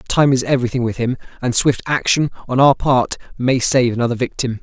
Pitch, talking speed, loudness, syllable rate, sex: 125 Hz, 195 wpm, -17 LUFS, 5.7 syllables/s, male